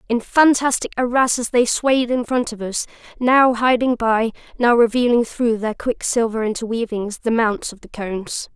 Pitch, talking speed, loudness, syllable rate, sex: 235 Hz, 155 wpm, -18 LUFS, 4.7 syllables/s, female